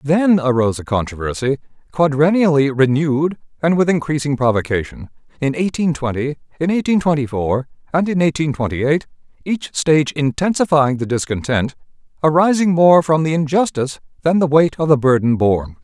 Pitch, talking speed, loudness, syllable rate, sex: 150 Hz, 145 wpm, -17 LUFS, 5.5 syllables/s, male